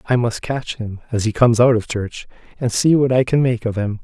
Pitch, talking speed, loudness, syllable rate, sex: 120 Hz, 270 wpm, -18 LUFS, 5.5 syllables/s, male